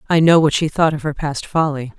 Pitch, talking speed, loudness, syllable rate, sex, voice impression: 150 Hz, 270 wpm, -17 LUFS, 5.7 syllables/s, female, feminine, slightly adult-like, slightly tensed, slightly refreshing, slightly sincere, slightly elegant